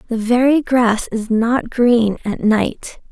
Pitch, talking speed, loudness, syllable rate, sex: 235 Hz, 155 wpm, -16 LUFS, 3.3 syllables/s, female